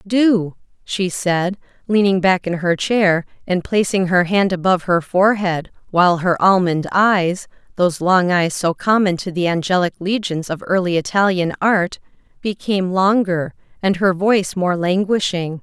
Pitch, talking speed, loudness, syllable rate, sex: 185 Hz, 140 wpm, -17 LUFS, 4.6 syllables/s, female